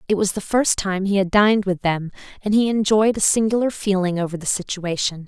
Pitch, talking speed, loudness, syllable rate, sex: 195 Hz, 215 wpm, -20 LUFS, 5.6 syllables/s, female